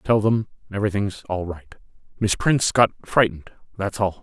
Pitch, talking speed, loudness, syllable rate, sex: 100 Hz, 140 wpm, -22 LUFS, 5.7 syllables/s, male